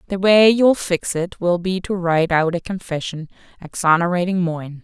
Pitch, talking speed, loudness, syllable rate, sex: 180 Hz, 175 wpm, -18 LUFS, 5.1 syllables/s, female